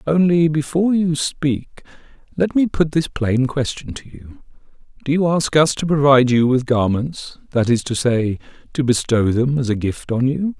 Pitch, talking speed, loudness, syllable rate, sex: 140 Hz, 180 wpm, -18 LUFS, 4.6 syllables/s, male